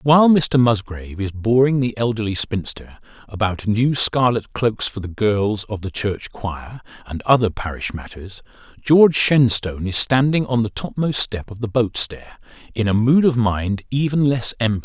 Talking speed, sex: 180 wpm, male